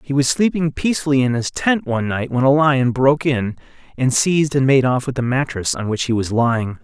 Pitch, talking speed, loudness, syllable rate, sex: 130 Hz, 235 wpm, -18 LUFS, 5.7 syllables/s, male